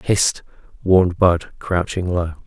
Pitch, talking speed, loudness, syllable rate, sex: 90 Hz, 120 wpm, -18 LUFS, 3.6 syllables/s, male